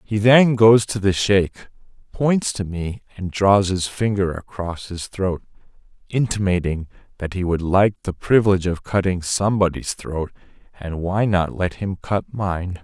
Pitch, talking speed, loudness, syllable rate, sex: 95 Hz, 160 wpm, -20 LUFS, 4.4 syllables/s, male